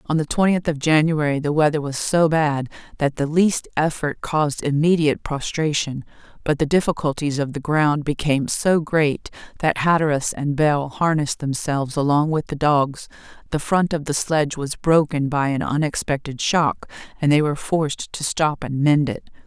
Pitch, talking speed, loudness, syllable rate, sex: 150 Hz, 175 wpm, -20 LUFS, 5.0 syllables/s, female